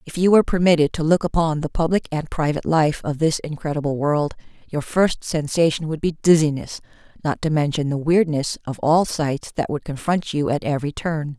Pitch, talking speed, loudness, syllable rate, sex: 155 Hz, 195 wpm, -21 LUFS, 5.4 syllables/s, female